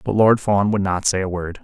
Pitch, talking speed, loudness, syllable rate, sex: 95 Hz, 295 wpm, -18 LUFS, 5.2 syllables/s, male